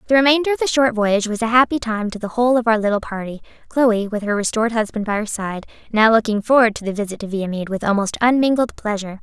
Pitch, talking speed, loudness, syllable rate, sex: 220 Hz, 240 wpm, -18 LUFS, 6.8 syllables/s, female